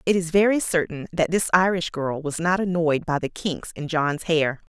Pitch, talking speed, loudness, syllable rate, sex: 165 Hz, 215 wpm, -23 LUFS, 4.8 syllables/s, female